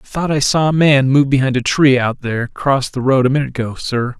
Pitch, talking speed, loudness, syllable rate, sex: 135 Hz, 270 wpm, -15 LUFS, 6.1 syllables/s, male